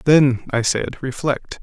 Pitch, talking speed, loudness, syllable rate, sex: 135 Hz, 145 wpm, -19 LUFS, 3.7 syllables/s, male